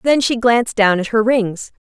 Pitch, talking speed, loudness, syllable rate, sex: 225 Hz, 225 wpm, -15 LUFS, 4.9 syllables/s, female